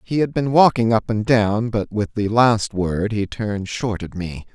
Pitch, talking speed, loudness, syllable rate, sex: 110 Hz, 225 wpm, -19 LUFS, 4.3 syllables/s, male